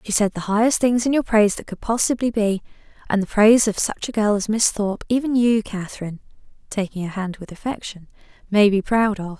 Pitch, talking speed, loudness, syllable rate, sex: 210 Hz, 215 wpm, -20 LUFS, 5.9 syllables/s, female